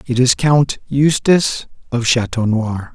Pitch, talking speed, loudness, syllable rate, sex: 125 Hz, 140 wpm, -16 LUFS, 4.0 syllables/s, male